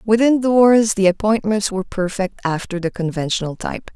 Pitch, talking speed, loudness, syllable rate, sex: 205 Hz, 150 wpm, -18 LUFS, 5.3 syllables/s, female